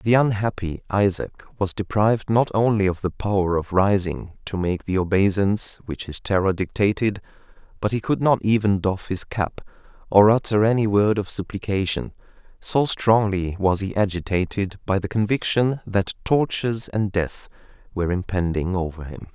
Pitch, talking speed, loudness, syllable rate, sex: 100 Hz, 155 wpm, -22 LUFS, 4.9 syllables/s, male